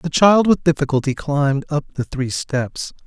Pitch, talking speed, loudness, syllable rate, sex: 145 Hz, 175 wpm, -18 LUFS, 4.7 syllables/s, male